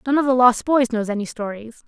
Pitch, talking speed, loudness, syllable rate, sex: 240 Hz, 255 wpm, -19 LUFS, 5.9 syllables/s, female